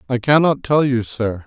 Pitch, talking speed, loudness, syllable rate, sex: 125 Hz, 205 wpm, -17 LUFS, 4.7 syllables/s, male